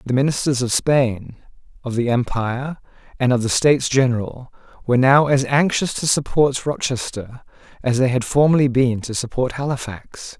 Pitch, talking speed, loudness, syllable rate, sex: 130 Hz, 155 wpm, -19 LUFS, 5.0 syllables/s, male